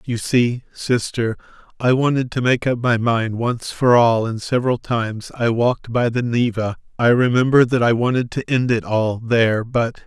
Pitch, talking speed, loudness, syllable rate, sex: 120 Hz, 190 wpm, -18 LUFS, 4.7 syllables/s, male